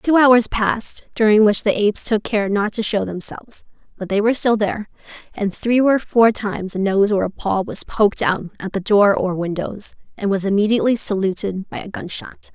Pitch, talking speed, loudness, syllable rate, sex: 210 Hz, 210 wpm, -18 LUFS, 5.2 syllables/s, female